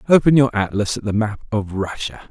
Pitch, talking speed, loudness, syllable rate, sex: 110 Hz, 210 wpm, -19 LUFS, 5.3 syllables/s, male